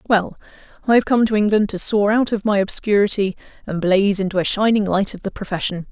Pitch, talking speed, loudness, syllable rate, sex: 205 Hz, 215 wpm, -18 LUFS, 6.1 syllables/s, female